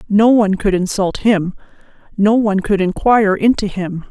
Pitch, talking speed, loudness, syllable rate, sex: 200 Hz, 160 wpm, -15 LUFS, 5.2 syllables/s, female